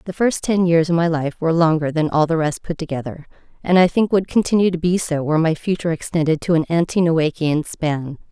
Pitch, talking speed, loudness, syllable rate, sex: 165 Hz, 230 wpm, -18 LUFS, 5.9 syllables/s, female